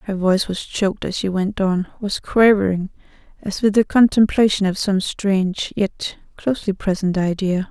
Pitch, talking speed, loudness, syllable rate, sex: 195 Hz, 155 wpm, -19 LUFS, 4.9 syllables/s, female